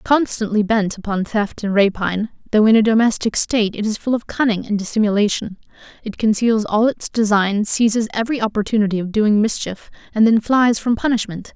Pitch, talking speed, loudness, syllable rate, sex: 215 Hz, 175 wpm, -18 LUFS, 5.6 syllables/s, female